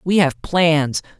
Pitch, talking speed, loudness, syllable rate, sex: 160 Hz, 150 wpm, -17 LUFS, 3.1 syllables/s, male